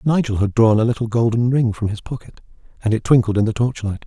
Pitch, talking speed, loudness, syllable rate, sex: 115 Hz, 235 wpm, -18 LUFS, 6.3 syllables/s, male